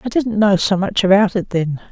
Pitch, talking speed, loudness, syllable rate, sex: 200 Hz, 250 wpm, -16 LUFS, 5.2 syllables/s, female